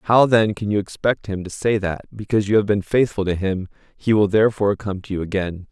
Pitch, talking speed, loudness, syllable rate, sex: 100 Hz, 240 wpm, -20 LUFS, 5.8 syllables/s, male